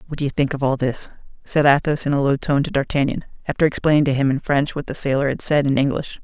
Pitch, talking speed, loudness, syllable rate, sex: 140 Hz, 270 wpm, -20 LUFS, 6.6 syllables/s, male